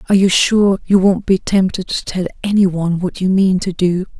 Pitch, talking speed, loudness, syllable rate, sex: 185 Hz, 230 wpm, -15 LUFS, 5.4 syllables/s, female